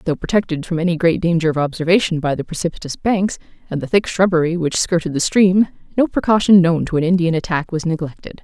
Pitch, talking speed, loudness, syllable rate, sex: 170 Hz, 205 wpm, -17 LUFS, 6.2 syllables/s, female